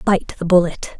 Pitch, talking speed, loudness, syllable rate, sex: 180 Hz, 180 wpm, -17 LUFS, 4.7 syllables/s, female